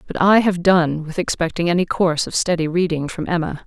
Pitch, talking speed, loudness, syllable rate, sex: 170 Hz, 215 wpm, -18 LUFS, 5.7 syllables/s, female